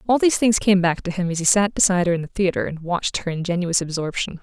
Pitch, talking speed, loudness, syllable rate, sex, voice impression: 180 Hz, 270 wpm, -20 LUFS, 6.8 syllables/s, female, feminine, adult-like, slightly clear, fluent, slightly cool, intellectual